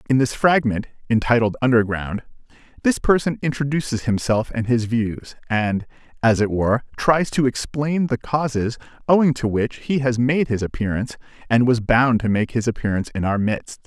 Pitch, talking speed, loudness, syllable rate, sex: 120 Hz, 170 wpm, -20 LUFS, 5.1 syllables/s, male